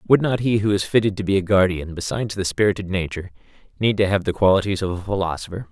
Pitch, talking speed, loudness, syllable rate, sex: 100 Hz, 230 wpm, -21 LUFS, 6.8 syllables/s, male